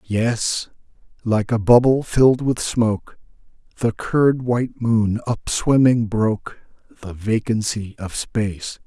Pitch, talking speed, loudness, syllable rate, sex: 115 Hz, 110 wpm, -19 LUFS, 4.0 syllables/s, male